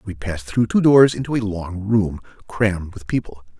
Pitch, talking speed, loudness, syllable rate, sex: 100 Hz, 200 wpm, -19 LUFS, 5.2 syllables/s, male